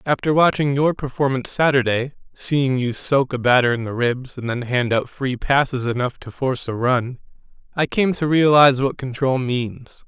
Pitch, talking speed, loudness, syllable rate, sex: 130 Hz, 175 wpm, -19 LUFS, 4.9 syllables/s, male